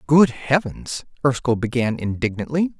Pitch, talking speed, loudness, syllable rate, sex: 135 Hz, 105 wpm, -21 LUFS, 4.6 syllables/s, male